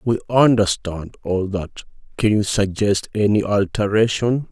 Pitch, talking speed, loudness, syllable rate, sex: 105 Hz, 120 wpm, -19 LUFS, 4.3 syllables/s, male